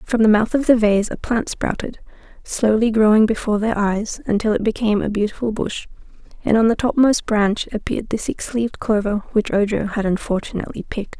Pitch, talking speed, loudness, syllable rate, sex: 215 Hz, 190 wpm, -19 LUFS, 5.7 syllables/s, female